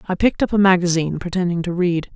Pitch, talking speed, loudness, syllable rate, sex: 180 Hz, 225 wpm, -18 LUFS, 7.1 syllables/s, female